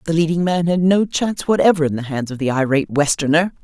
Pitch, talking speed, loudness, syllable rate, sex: 160 Hz, 230 wpm, -17 LUFS, 6.5 syllables/s, female